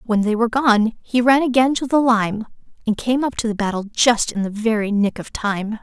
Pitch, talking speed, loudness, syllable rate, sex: 225 Hz, 235 wpm, -19 LUFS, 5.2 syllables/s, female